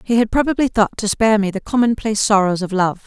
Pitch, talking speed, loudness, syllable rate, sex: 215 Hz, 235 wpm, -17 LUFS, 6.4 syllables/s, female